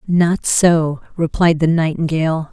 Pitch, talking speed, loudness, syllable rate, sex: 165 Hz, 120 wpm, -16 LUFS, 4.1 syllables/s, female